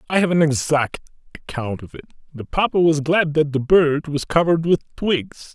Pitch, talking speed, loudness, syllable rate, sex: 150 Hz, 195 wpm, -19 LUFS, 5.0 syllables/s, male